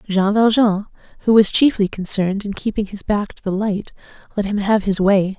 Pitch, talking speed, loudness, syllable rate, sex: 205 Hz, 200 wpm, -18 LUFS, 5.2 syllables/s, female